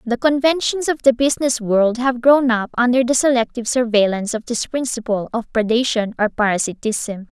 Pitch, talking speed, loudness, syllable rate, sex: 240 Hz, 160 wpm, -18 LUFS, 5.4 syllables/s, female